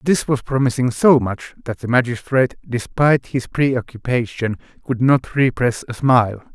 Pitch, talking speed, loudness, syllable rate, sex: 125 Hz, 145 wpm, -18 LUFS, 4.8 syllables/s, male